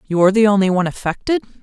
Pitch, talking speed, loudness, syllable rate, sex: 200 Hz, 220 wpm, -16 LUFS, 8.2 syllables/s, female